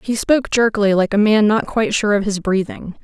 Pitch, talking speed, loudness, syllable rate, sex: 210 Hz, 235 wpm, -16 LUFS, 5.9 syllables/s, female